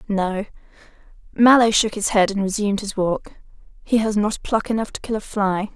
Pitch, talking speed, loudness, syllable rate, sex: 210 Hz, 190 wpm, -20 LUFS, 5.4 syllables/s, female